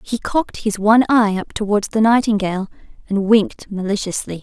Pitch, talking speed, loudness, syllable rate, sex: 210 Hz, 165 wpm, -17 LUFS, 5.6 syllables/s, female